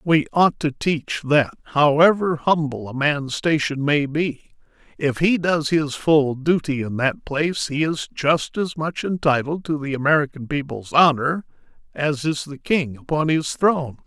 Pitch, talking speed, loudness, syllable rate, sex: 150 Hz, 165 wpm, -20 LUFS, 4.4 syllables/s, male